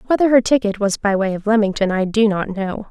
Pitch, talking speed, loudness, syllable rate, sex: 210 Hz, 250 wpm, -17 LUFS, 5.8 syllables/s, female